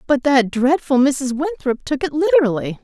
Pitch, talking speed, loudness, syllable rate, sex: 280 Hz, 170 wpm, -17 LUFS, 4.9 syllables/s, female